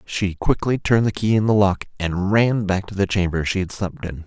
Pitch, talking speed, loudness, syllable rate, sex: 100 Hz, 255 wpm, -20 LUFS, 5.2 syllables/s, male